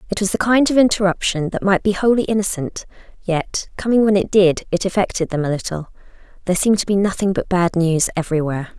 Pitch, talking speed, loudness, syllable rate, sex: 190 Hz, 205 wpm, -18 LUFS, 6.3 syllables/s, female